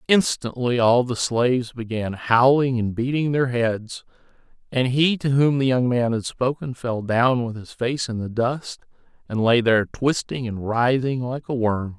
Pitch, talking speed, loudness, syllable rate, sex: 125 Hz, 180 wpm, -21 LUFS, 4.3 syllables/s, male